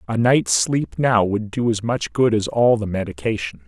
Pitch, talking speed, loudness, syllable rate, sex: 110 Hz, 210 wpm, -19 LUFS, 4.6 syllables/s, male